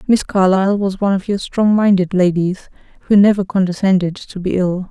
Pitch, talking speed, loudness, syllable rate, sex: 190 Hz, 185 wpm, -15 LUFS, 5.5 syllables/s, female